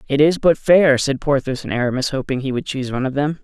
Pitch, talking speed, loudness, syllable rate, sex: 140 Hz, 260 wpm, -18 LUFS, 6.5 syllables/s, male